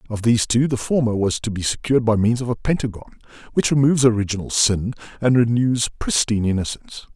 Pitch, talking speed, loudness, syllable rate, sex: 115 Hz, 185 wpm, -20 LUFS, 6.6 syllables/s, male